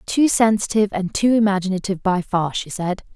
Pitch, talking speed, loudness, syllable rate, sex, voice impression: 200 Hz, 170 wpm, -19 LUFS, 5.8 syllables/s, female, feminine, adult-like, tensed, powerful, bright, clear, fluent, slightly cute, friendly, lively, sharp